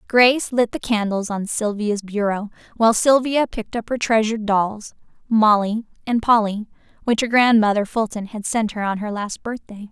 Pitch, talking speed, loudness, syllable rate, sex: 220 Hz, 170 wpm, -20 LUFS, 5.1 syllables/s, female